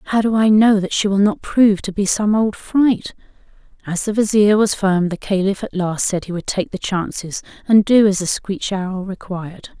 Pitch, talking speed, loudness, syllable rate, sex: 200 Hz, 220 wpm, -17 LUFS, 4.8 syllables/s, female